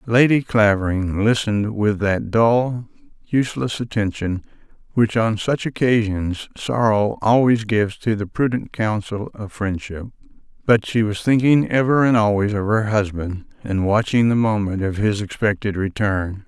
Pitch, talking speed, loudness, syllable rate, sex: 110 Hz, 140 wpm, -19 LUFS, 4.5 syllables/s, male